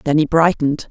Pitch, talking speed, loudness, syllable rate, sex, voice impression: 155 Hz, 200 wpm, -16 LUFS, 6.3 syllables/s, female, very feminine, adult-like, slightly calm, elegant, slightly sweet